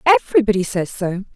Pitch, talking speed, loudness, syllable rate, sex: 215 Hz, 135 wpm, -18 LUFS, 6.0 syllables/s, female